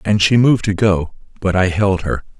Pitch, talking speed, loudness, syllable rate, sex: 95 Hz, 225 wpm, -16 LUFS, 5.2 syllables/s, male